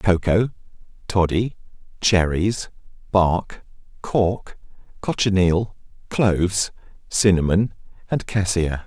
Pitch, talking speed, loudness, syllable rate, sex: 95 Hz, 70 wpm, -21 LUFS, 3.4 syllables/s, male